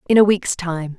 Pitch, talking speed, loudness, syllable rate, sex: 180 Hz, 245 wpm, -18 LUFS, 4.9 syllables/s, female